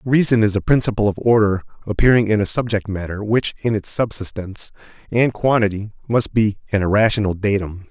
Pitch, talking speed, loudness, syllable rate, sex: 105 Hz, 165 wpm, -18 LUFS, 5.7 syllables/s, male